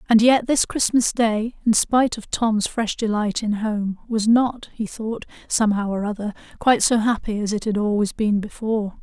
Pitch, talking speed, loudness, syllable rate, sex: 220 Hz, 195 wpm, -21 LUFS, 4.9 syllables/s, female